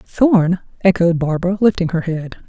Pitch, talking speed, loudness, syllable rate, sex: 180 Hz, 145 wpm, -16 LUFS, 4.9 syllables/s, female